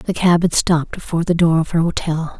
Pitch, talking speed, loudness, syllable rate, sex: 165 Hz, 250 wpm, -17 LUFS, 6.0 syllables/s, female